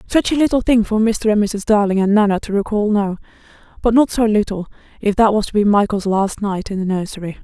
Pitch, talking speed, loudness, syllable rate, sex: 210 Hz, 235 wpm, -17 LUFS, 5.9 syllables/s, female